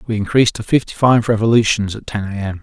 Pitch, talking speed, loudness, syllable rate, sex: 110 Hz, 230 wpm, -16 LUFS, 6.4 syllables/s, male